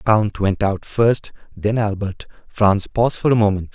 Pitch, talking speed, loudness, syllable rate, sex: 105 Hz, 190 wpm, -19 LUFS, 4.6 syllables/s, male